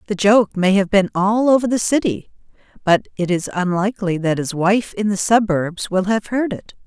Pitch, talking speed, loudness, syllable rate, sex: 200 Hz, 200 wpm, -18 LUFS, 4.8 syllables/s, female